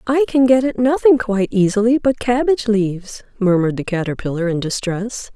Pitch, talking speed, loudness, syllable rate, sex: 220 Hz, 170 wpm, -17 LUFS, 5.6 syllables/s, female